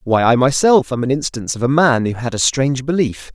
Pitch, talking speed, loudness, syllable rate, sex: 130 Hz, 250 wpm, -16 LUFS, 5.9 syllables/s, male